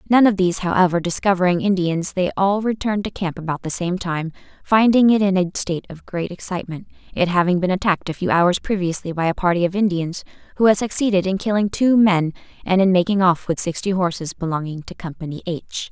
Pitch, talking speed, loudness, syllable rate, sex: 185 Hz, 205 wpm, -19 LUFS, 6.0 syllables/s, female